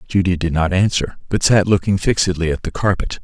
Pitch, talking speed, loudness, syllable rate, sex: 90 Hz, 205 wpm, -17 LUFS, 5.8 syllables/s, male